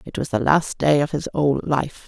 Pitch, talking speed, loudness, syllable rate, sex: 145 Hz, 260 wpm, -21 LUFS, 4.7 syllables/s, female